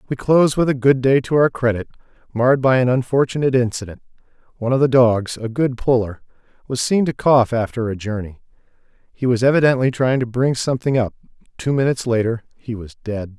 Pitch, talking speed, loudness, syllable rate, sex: 125 Hz, 180 wpm, -18 LUFS, 6.1 syllables/s, male